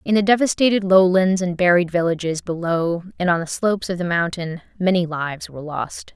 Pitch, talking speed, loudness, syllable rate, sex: 175 Hz, 185 wpm, -20 LUFS, 5.6 syllables/s, female